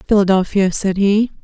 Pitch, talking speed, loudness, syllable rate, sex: 195 Hz, 125 wpm, -15 LUFS, 5.2 syllables/s, female